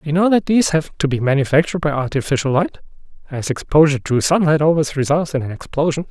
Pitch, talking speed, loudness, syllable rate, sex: 150 Hz, 195 wpm, -17 LUFS, 6.6 syllables/s, male